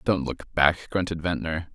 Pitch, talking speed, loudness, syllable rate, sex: 85 Hz, 170 wpm, -25 LUFS, 4.6 syllables/s, male